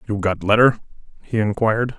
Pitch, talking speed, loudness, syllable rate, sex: 110 Hz, 150 wpm, -19 LUFS, 6.0 syllables/s, male